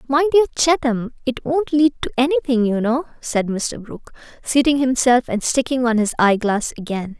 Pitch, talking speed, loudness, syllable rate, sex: 250 Hz, 185 wpm, -18 LUFS, 5.1 syllables/s, female